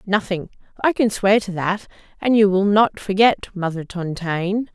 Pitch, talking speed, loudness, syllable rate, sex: 200 Hz, 165 wpm, -19 LUFS, 4.7 syllables/s, female